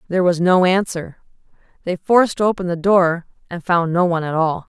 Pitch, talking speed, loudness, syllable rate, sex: 175 Hz, 190 wpm, -17 LUFS, 5.5 syllables/s, female